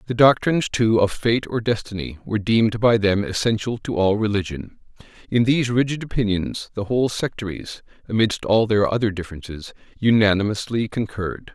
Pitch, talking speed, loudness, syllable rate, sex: 110 Hz, 150 wpm, -21 LUFS, 5.6 syllables/s, male